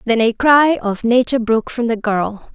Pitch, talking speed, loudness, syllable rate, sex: 235 Hz, 210 wpm, -16 LUFS, 5.1 syllables/s, female